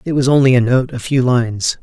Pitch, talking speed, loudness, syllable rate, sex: 125 Hz, 265 wpm, -14 LUFS, 5.8 syllables/s, male